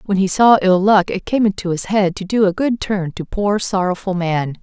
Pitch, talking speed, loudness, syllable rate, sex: 195 Hz, 245 wpm, -17 LUFS, 5.0 syllables/s, female